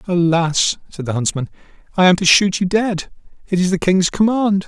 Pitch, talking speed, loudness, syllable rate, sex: 185 Hz, 195 wpm, -16 LUFS, 5.0 syllables/s, male